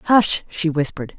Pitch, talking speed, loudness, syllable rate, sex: 175 Hz, 150 wpm, -20 LUFS, 4.5 syllables/s, female